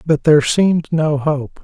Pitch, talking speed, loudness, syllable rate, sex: 155 Hz, 185 wpm, -15 LUFS, 4.6 syllables/s, male